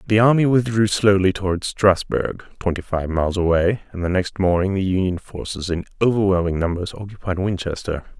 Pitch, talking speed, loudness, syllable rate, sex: 95 Hz, 160 wpm, -20 LUFS, 5.5 syllables/s, male